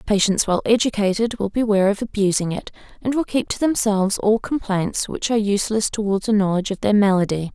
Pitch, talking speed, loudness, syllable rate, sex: 210 Hz, 190 wpm, -20 LUFS, 6.0 syllables/s, female